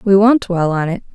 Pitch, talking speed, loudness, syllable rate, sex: 190 Hz, 265 wpm, -15 LUFS, 5.2 syllables/s, female